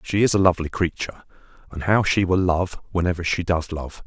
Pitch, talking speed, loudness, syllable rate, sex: 90 Hz, 205 wpm, -22 LUFS, 5.9 syllables/s, male